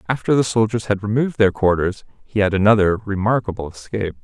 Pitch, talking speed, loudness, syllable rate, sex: 105 Hz, 170 wpm, -19 LUFS, 6.2 syllables/s, male